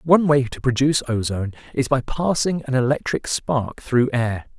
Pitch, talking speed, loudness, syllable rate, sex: 135 Hz, 170 wpm, -21 LUFS, 5.1 syllables/s, male